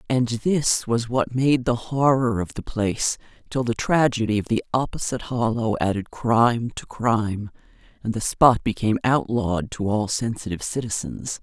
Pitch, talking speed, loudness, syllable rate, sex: 120 Hz, 160 wpm, -23 LUFS, 4.9 syllables/s, female